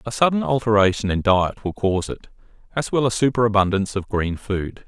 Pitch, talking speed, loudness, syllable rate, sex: 105 Hz, 185 wpm, -20 LUFS, 5.8 syllables/s, male